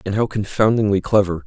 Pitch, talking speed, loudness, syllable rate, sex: 100 Hz, 165 wpm, -18 LUFS, 5.9 syllables/s, male